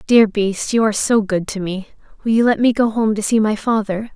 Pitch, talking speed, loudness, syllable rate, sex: 215 Hz, 260 wpm, -17 LUFS, 5.4 syllables/s, female